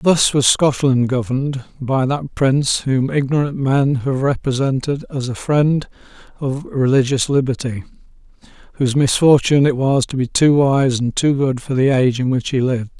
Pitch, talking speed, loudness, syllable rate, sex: 135 Hz, 165 wpm, -17 LUFS, 4.9 syllables/s, male